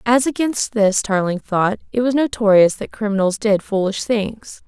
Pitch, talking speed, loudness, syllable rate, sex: 215 Hz, 165 wpm, -18 LUFS, 4.6 syllables/s, female